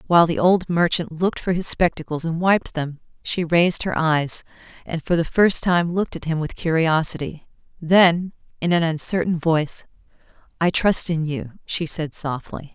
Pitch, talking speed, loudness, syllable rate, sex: 165 Hz, 175 wpm, -21 LUFS, 4.8 syllables/s, female